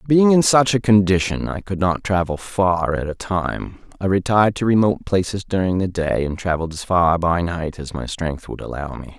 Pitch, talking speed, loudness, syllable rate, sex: 95 Hz, 215 wpm, -19 LUFS, 5.1 syllables/s, male